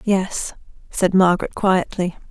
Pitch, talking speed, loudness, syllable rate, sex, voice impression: 185 Hz, 105 wpm, -19 LUFS, 4.1 syllables/s, female, feminine, adult-like, fluent, slightly intellectual, slightly calm, slightly reassuring